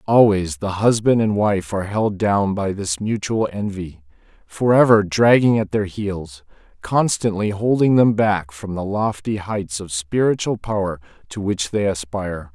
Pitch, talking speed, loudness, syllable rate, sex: 100 Hz, 155 wpm, -19 LUFS, 4.3 syllables/s, male